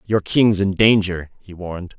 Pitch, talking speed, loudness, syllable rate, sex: 95 Hz, 180 wpm, -17 LUFS, 4.4 syllables/s, male